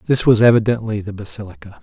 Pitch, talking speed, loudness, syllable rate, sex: 110 Hz, 165 wpm, -15 LUFS, 6.7 syllables/s, male